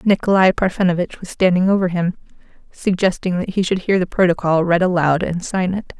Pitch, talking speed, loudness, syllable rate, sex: 180 Hz, 180 wpm, -18 LUFS, 5.6 syllables/s, female